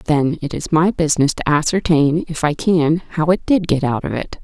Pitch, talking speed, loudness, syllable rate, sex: 160 Hz, 230 wpm, -17 LUFS, 4.9 syllables/s, female